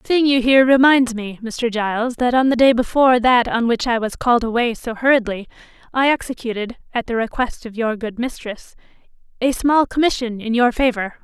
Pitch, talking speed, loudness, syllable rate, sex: 240 Hz, 190 wpm, -18 LUFS, 5.4 syllables/s, female